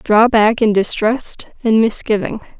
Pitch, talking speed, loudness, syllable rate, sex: 220 Hz, 140 wpm, -15 LUFS, 4.1 syllables/s, female